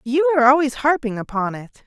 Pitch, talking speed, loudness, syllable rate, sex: 255 Hz, 195 wpm, -18 LUFS, 6.3 syllables/s, female